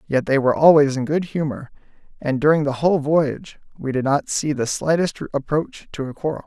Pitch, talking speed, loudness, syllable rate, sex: 145 Hz, 205 wpm, -20 LUFS, 5.6 syllables/s, male